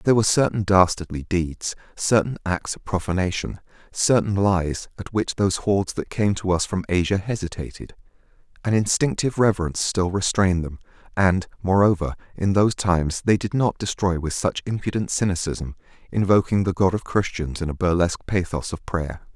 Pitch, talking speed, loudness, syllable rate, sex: 95 Hz, 160 wpm, -22 LUFS, 5.5 syllables/s, male